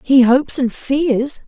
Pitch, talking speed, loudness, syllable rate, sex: 260 Hz, 165 wpm, -16 LUFS, 3.8 syllables/s, female